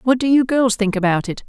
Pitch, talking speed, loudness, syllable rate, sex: 230 Hz, 285 wpm, -17 LUFS, 5.8 syllables/s, female